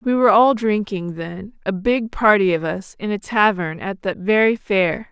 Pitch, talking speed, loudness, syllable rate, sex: 205 Hz, 200 wpm, -19 LUFS, 4.4 syllables/s, female